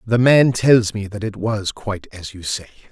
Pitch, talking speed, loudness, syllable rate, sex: 105 Hz, 225 wpm, -18 LUFS, 4.6 syllables/s, male